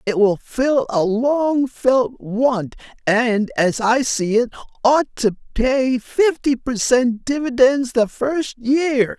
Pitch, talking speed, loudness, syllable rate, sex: 245 Hz, 135 wpm, -18 LUFS, 3.1 syllables/s, male